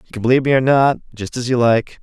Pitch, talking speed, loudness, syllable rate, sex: 125 Hz, 295 wpm, -16 LUFS, 6.9 syllables/s, male